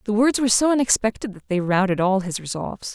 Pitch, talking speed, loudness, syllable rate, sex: 210 Hz, 225 wpm, -21 LUFS, 6.4 syllables/s, female